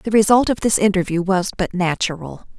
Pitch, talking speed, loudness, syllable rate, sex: 195 Hz, 185 wpm, -18 LUFS, 5.4 syllables/s, female